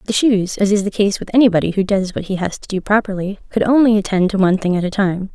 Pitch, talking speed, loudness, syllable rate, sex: 200 Hz, 280 wpm, -16 LUFS, 6.5 syllables/s, female